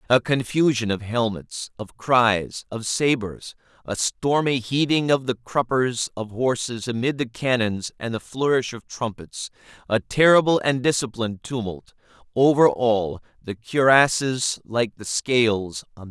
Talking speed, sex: 145 wpm, male